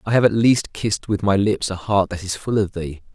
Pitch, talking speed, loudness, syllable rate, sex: 100 Hz, 285 wpm, -20 LUFS, 5.5 syllables/s, male